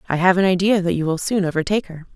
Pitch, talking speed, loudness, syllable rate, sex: 180 Hz, 280 wpm, -19 LUFS, 7.3 syllables/s, female